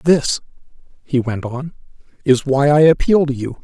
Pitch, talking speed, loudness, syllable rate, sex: 140 Hz, 165 wpm, -16 LUFS, 4.5 syllables/s, male